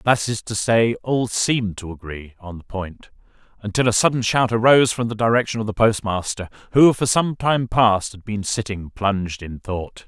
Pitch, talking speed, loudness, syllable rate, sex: 110 Hz, 195 wpm, -20 LUFS, 4.9 syllables/s, male